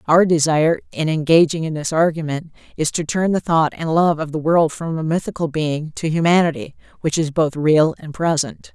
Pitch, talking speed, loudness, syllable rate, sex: 160 Hz, 200 wpm, -18 LUFS, 5.2 syllables/s, female